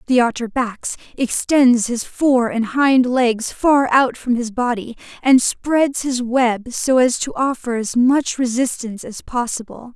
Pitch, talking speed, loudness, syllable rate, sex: 245 Hz, 165 wpm, -18 LUFS, 3.9 syllables/s, female